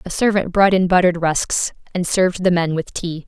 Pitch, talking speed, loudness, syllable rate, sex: 180 Hz, 220 wpm, -18 LUFS, 5.4 syllables/s, female